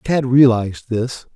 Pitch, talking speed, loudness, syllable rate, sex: 120 Hz, 135 wpm, -16 LUFS, 4.2 syllables/s, male